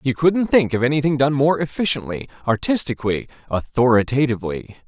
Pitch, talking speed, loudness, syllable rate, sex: 135 Hz, 125 wpm, -19 LUFS, 5.8 syllables/s, male